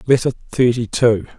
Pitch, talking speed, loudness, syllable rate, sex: 120 Hz, 130 wpm, -17 LUFS, 5.2 syllables/s, male